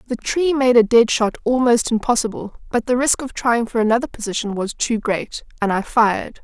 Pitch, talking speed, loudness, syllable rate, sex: 235 Hz, 205 wpm, -18 LUFS, 5.3 syllables/s, female